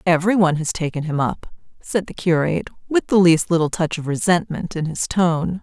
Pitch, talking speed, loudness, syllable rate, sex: 170 Hz, 205 wpm, -19 LUFS, 5.6 syllables/s, female